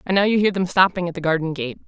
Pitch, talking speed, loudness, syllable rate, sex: 175 Hz, 320 wpm, -20 LUFS, 7.1 syllables/s, female